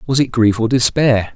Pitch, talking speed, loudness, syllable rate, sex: 120 Hz, 220 wpm, -15 LUFS, 5.0 syllables/s, male